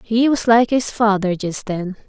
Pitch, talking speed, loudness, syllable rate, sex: 215 Hz, 200 wpm, -17 LUFS, 4.2 syllables/s, female